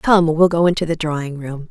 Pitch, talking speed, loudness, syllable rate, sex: 160 Hz, 245 wpm, -17 LUFS, 5.4 syllables/s, female